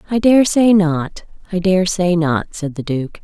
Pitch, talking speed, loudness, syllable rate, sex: 180 Hz, 205 wpm, -16 LUFS, 4.1 syllables/s, female